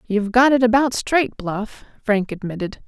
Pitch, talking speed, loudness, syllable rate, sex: 225 Hz, 165 wpm, -19 LUFS, 4.7 syllables/s, female